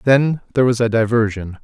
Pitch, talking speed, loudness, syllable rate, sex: 115 Hz, 185 wpm, -17 LUFS, 5.8 syllables/s, male